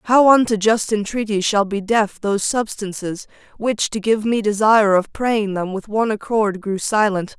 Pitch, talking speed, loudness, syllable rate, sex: 210 Hz, 180 wpm, -18 LUFS, 4.7 syllables/s, female